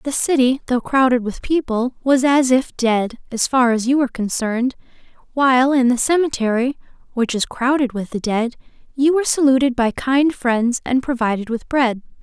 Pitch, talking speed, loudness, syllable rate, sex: 255 Hz, 175 wpm, -18 LUFS, 5.1 syllables/s, female